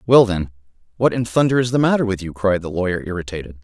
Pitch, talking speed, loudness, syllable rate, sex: 100 Hz, 230 wpm, -19 LUFS, 6.7 syllables/s, male